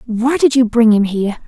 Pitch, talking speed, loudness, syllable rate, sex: 235 Hz, 245 wpm, -13 LUFS, 5.3 syllables/s, female